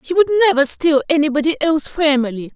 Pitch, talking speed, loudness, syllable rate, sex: 315 Hz, 165 wpm, -16 LUFS, 6.6 syllables/s, female